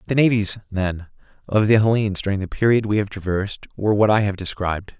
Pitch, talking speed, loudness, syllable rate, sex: 100 Hz, 205 wpm, -20 LUFS, 6.4 syllables/s, male